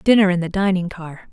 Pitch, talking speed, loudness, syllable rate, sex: 185 Hz, 225 wpm, -19 LUFS, 5.5 syllables/s, female